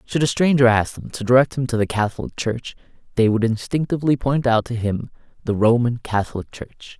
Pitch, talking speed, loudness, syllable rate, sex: 120 Hz, 195 wpm, -20 LUFS, 5.6 syllables/s, male